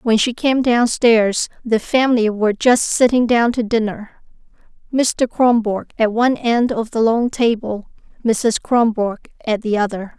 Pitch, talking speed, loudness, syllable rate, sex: 230 Hz, 155 wpm, -17 LUFS, 4.3 syllables/s, female